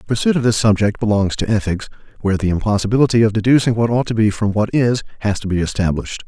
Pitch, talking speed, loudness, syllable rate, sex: 110 Hz, 230 wpm, -17 LUFS, 7.1 syllables/s, male